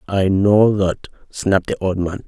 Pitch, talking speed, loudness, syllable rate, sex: 95 Hz, 185 wpm, -17 LUFS, 4.4 syllables/s, male